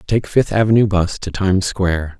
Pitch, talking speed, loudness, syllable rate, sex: 95 Hz, 190 wpm, -17 LUFS, 5.4 syllables/s, male